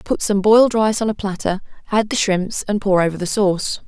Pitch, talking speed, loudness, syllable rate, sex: 200 Hz, 230 wpm, -18 LUFS, 5.5 syllables/s, female